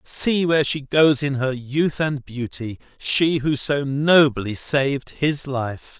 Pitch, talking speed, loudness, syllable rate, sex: 140 Hz, 160 wpm, -20 LUFS, 3.5 syllables/s, male